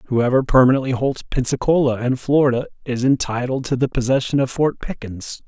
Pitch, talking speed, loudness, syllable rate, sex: 130 Hz, 155 wpm, -19 LUFS, 5.5 syllables/s, male